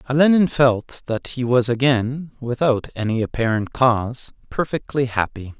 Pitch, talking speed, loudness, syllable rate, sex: 125 Hz, 130 wpm, -20 LUFS, 4.5 syllables/s, male